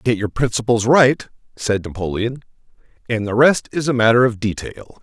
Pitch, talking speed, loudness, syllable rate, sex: 120 Hz, 165 wpm, -18 LUFS, 5.0 syllables/s, male